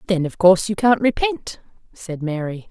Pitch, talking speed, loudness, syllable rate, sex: 185 Hz, 180 wpm, -18 LUFS, 5.0 syllables/s, female